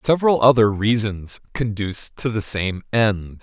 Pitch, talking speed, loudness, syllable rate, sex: 110 Hz, 140 wpm, -20 LUFS, 4.5 syllables/s, male